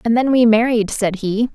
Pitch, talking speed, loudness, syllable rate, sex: 225 Hz, 235 wpm, -16 LUFS, 4.9 syllables/s, female